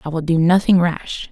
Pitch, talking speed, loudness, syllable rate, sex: 170 Hz, 225 wpm, -16 LUFS, 5.0 syllables/s, female